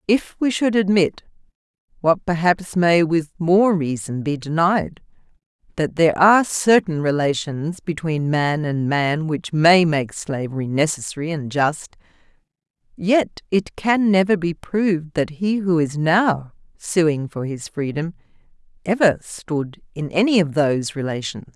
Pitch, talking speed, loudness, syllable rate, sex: 165 Hz, 140 wpm, -20 LUFS, 4.1 syllables/s, female